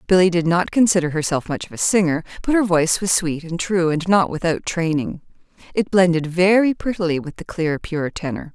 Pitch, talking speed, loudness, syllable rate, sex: 175 Hz, 205 wpm, -19 LUFS, 5.5 syllables/s, female